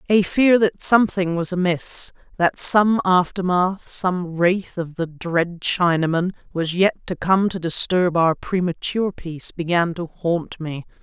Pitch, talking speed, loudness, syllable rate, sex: 180 Hz, 150 wpm, -20 LUFS, 4.1 syllables/s, female